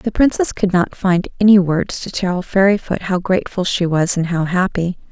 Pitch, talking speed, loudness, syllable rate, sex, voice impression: 185 Hz, 200 wpm, -16 LUFS, 4.9 syllables/s, female, feminine, slightly adult-like, slightly weak, soft, slightly muffled, cute, friendly, sweet